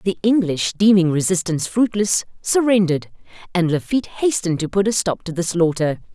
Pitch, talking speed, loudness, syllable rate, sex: 190 Hz, 155 wpm, -19 LUFS, 5.7 syllables/s, female